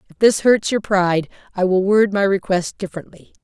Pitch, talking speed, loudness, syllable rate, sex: 195 Hz, 190 wpm, -17 LUFS, 5.5 syllables/s, female